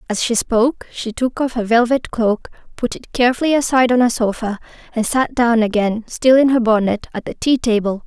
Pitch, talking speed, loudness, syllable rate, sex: 235 Hz, 210 wpm, -17 LUFS, 5.5 syllables/s, female